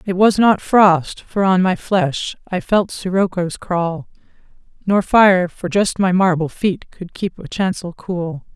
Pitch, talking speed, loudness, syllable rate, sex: 185 Hz, 170 wpm, -17 LUFS, 3.7 syllables/s, female